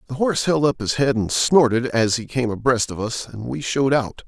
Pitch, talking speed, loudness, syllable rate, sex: 125 Hz, 255 wpm, -20 LUFS, 5.4 syllables/s, male